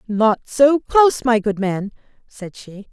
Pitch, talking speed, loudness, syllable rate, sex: 230 Hz, 165 wpm, -17 LUFS, 3.8 syllables/s, female